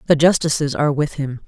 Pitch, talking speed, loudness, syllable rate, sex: 150 Hz, 205 wpm, -18 LUFS, 6.3 syllables/s, female